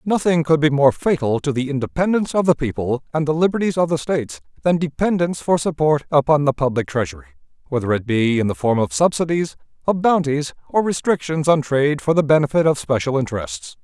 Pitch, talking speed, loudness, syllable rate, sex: 145 Hz, 195 wpm, -19 LUFS, 6.0 syllables/s, male